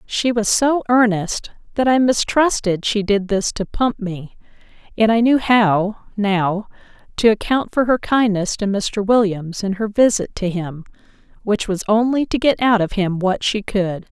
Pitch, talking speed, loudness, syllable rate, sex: 210 Hz, 175 wpm, -18 LUFS, 4.2 syllables/s, female